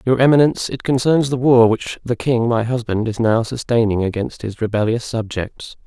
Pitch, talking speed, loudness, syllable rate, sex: 115 Hz, 185 wpm, -18 LUFS, 5.1 syllables/s, male